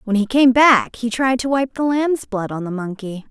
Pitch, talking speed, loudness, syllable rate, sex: 235 Hz, 255 wpm, -17 LUFS, 4.8 syllables/s, female